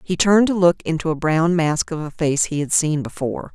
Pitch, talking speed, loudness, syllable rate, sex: 160 Hz, 255 wpm, -19 LUFS, 5.6 syllables/s, female